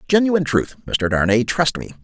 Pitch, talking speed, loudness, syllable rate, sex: 145 Hz, 175 wpm, -18 LUFS, 5.3 syllables/s, male